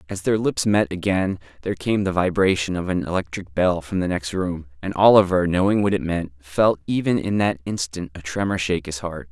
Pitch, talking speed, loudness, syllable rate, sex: 90 Hz, 210 wpm, -21 LUFS, 5.4 syllables/s, male